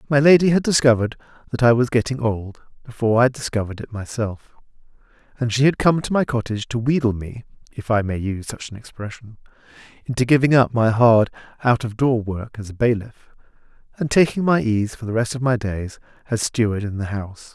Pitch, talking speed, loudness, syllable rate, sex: 120 Hz, 200 wpm, -20 LUFS, 5.4 syllables/s, male